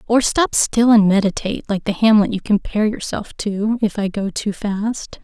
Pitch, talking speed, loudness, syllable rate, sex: 210 Hz, 195 wpm, -18 LUFS, 4.8 syllables/s, female